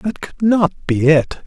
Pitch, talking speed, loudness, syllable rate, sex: 175 Hz, 205 wpm, -16 LUFS, 3.5 syllables/s, male